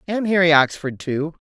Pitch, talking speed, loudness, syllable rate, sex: 160 Hz, 165 wpm, -19 LUFS, 4.9 syllables/s, female